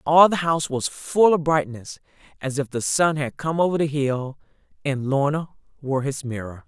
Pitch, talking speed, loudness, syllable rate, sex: 145 Hz, 190 wpm, -22 LUFS, 5.0 syllables/s, female